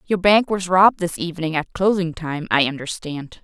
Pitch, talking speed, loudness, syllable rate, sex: 175 Hz, 190 wpm, -19 LUFS, 5.2 syllables/s, female